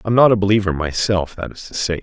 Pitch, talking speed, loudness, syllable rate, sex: 95 Hz, 265 wpm, -18 LUFS, 6.3 syllables/s, male